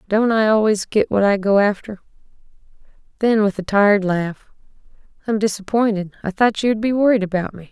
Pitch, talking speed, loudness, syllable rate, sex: 205 Hz, 180 wpm, -18 LUFS, 5.7 syllables/s, female